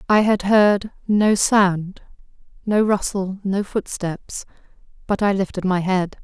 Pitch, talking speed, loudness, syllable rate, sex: 195 Hz, 125 wpm, -19 LUFS, 3.7 syllables/s, female